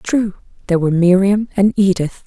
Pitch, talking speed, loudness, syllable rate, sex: 190 Hz, 160 wpm, -15 LUFS, 5.6 syllables/s, female